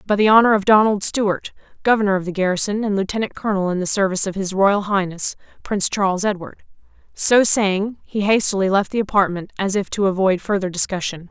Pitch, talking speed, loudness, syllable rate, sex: 195 Hz, 190 wpm, -18 LUFS, 6.1 syllables/s, female